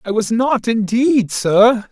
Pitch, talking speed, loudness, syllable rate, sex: 225 Hz, 155 wpm, -15 LUFS, 3.3 syllables/s, male